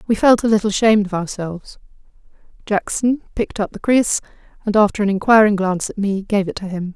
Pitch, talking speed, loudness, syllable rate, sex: 205 Hz, 200 wpm, -18 LUFS, 6.3 syllables/s, female